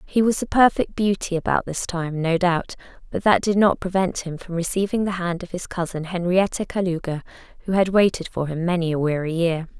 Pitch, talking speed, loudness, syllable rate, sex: 180 Hz, 210 wpm, -22 LUFS, 5.4 syllables/s, female